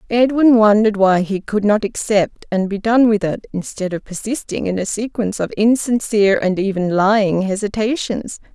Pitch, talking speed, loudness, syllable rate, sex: 210 Hz, 170 wpm, -17 LUFS, 5.1 syllables/s, female